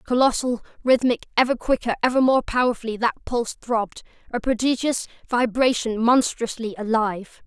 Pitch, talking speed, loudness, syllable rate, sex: 235 Hz, 110 wpm, -22 LUFS, 5.6 syllables/s, female